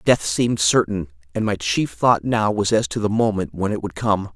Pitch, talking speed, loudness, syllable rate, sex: 105 Hz, 235 wpm, -20 LUFS, 5.1 syllables/s, male